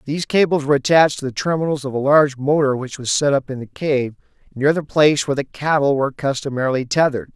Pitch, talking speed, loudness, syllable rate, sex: 140 Hz, 220 wpm, -18 LUFS, 6.7 syllables/s, male